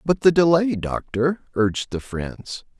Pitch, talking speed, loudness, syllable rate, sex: 135 Hz, 150 wpm, -21 LUFS, 4.1 syllables/s, male